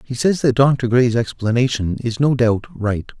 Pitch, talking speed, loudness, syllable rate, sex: 120 Hz, 190 wpm, -18 LUFS, 4.3 syllables/s, male